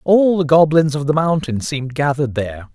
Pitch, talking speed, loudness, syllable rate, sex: 145 Hz, 195 wpm, -16 LUFS, 5.7 syllables/s, male